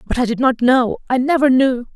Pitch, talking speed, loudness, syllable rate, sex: 255 Hz, 245 wpm, -16 LUFS, 5.2 syllables/s, female